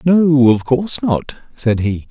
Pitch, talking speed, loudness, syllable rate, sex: 135 Hz, 170 wpm, -15 LUFS, 3.9 syllables/s, male